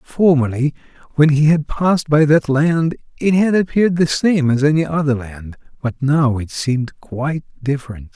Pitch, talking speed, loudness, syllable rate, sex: 145 Hz, 170 wpm, -17 LUFS, 4.9 syllables/s, male